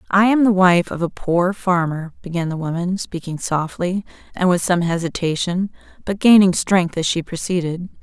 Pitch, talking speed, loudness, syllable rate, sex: 180 Hz, 170 wpm, -19 LUFS, 4.9 syllables/s, female